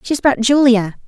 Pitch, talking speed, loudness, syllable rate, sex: 245 Hz, 170 wpm, -14 LUFS, 4.4 syllables/s, female